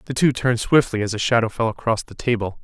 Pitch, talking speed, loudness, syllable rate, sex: 115 Hz, 250 wpm, -20 LUFS, 6.5 syllables/s, male